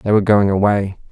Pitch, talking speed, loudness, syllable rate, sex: 100 Hz, 215 wpm, -15 LUFS, 6.1 syllables/s, male